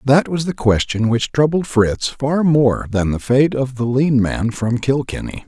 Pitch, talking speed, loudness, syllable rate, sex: 130 Hz, 195 wpm, -17 LUFS, 4.2 syllables/s, male